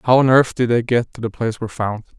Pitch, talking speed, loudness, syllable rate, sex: 120 Hz, 300 wpm, -18 LUFS, 6.4 syllables/s, male